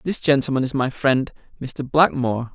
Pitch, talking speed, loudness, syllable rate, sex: 130 Hz, 165 wpm, -20 LUFS, 5.1 syllables/s, male